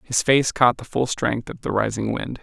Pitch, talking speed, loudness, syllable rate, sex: 120 Hz, 250 wpm, -21 LUFS, 4.8 syllables/s, male